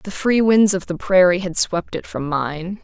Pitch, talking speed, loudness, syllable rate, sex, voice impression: 185 Hz, 235 wpm, -18 LUFS, 4.3 syllables/s, female, feminine, adult-like, tensed, powerful, bright, clear, fluent, intellectual, elegant, lively, slightly strict, slightly sharp